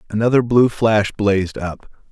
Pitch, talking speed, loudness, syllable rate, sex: 105 Hz, 140 wpm, -17 LUFS, 4.8 syllables/s, male